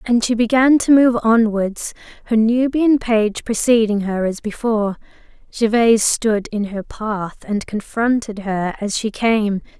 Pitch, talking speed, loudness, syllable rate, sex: 220 Hz, 145 wpm, -17 LUFS, 4.1 syllables/s, female